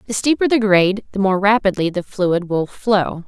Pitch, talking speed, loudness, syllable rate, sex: 200 Hz, 200 wpm, -17 LUFS, 5.0 syllables/s, female